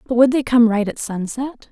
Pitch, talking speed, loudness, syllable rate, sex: 240 Hz, 245 wpm, -18 LUFS, 5.2 syllables/s, female